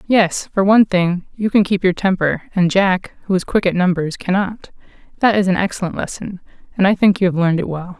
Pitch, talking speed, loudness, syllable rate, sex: 185 Hz, 225 wpm, -17 LUFS, 5.6 syllables/s, female